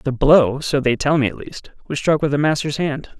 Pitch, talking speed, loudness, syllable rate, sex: 140 Hz, 265 wpm, -18 LUFS, 5.1 syllables/s, male